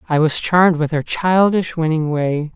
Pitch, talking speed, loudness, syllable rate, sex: 165 Hz, 190 wpm, -17 LUFS, 4.6 syllables/s, male